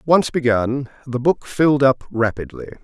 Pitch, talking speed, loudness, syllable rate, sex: 130 Hz, 150 wpm, -18 LUFS, 4.7 syllables/s, male